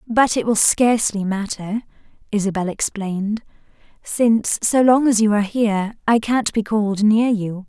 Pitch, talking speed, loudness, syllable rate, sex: 215 Hz, 150 wpm, -18 LUFS, 4.8 syllables/s, female